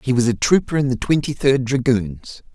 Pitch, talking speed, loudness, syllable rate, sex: 125 Hz, 235 wpm, -18 LUFS, 5.5 syllables/s, male